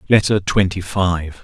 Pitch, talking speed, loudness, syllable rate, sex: 95 Hz, 125 wpm, -18 LUFS, 4.0 syllables/s, male